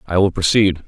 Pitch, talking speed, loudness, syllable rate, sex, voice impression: 95 Hz, 205 wpm, -16 LUFS, 5.3 syllables/s, male, masculine, middle-aged, tensed, powerful, slightly hard, clear, slightly raspy, cool, intellectual, mature, wild, lively, intense